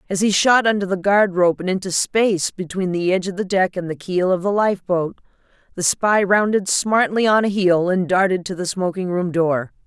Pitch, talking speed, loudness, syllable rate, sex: 185 Hz, 220 wpm, -19 LUFS, 5.3 syllables/s, female